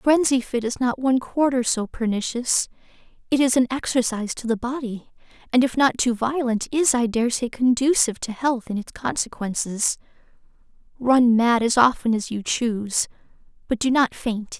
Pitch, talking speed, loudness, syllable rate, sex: 245 Hz, 170 wpm, -22 LUFS, 5.1 syllables/s, female